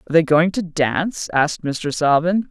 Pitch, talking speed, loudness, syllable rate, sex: 165 Hz, 190 wpm, -19 LUFS, 5.2 syllables/s, female